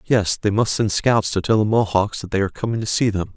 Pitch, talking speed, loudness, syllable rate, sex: 105 Hz, 285 wpm, -19 LUFS, 5.9 syllables/s, male